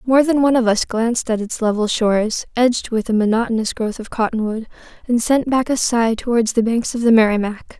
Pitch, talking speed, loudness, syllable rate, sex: 230 Hz, 215 wpm, -18 LUFS, 5.7 syllables/s, female